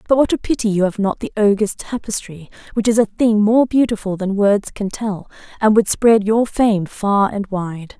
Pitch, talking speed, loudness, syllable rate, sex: 210 Hz, 210 wpm, -17 LUFS, 4.7 syllables/s, female